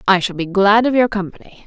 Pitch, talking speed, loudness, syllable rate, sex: 205 Hz, 250 wpm, -15 LUFS, 5.9 syllables/s, female